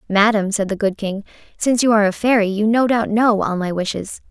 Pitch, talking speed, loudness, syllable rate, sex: 210 Hz, 235 wpm, -18 LUFS, 5.9 syllables/s, female